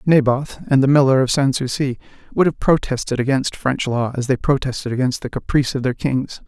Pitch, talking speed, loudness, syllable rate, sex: 135 Hz, 205 wpm, -19 LUFS, 5.6 syllables/s, male